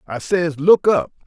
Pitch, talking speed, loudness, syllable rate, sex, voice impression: 155 Hz, 190 wpm, -17 LUFS, 4.0 syllables/s, male, very masculine, slightly old, thick, tensed, slightly weak, bright, soft, clear, slightly fluent, slightly raspy, very cool, intellectual, very sincere, very calm, very mature, very friendly, very reassuring, very unique, elegant, very wild, very sweet, very lively, kind